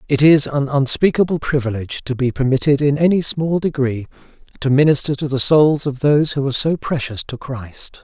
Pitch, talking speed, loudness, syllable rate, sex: 140 Hz, 185 wpm, -17 LUFS, 5.5 syllables/s, male